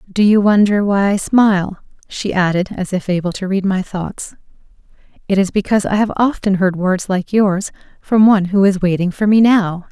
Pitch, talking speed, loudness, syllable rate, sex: 195 Hz, 200 wpm, -15 LUFS, 5.1 syllables/s, female